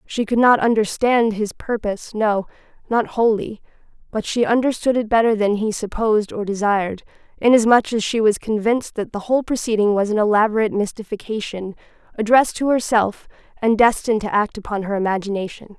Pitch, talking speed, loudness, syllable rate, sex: 215 Hz, 155 wpm, -19 LUFS, 5.8 syllables/s, female